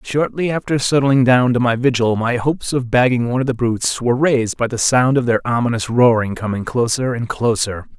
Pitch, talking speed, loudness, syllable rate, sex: 120 Hz, 210 wpm, -17 LUFS, 5.7 syllables/s, male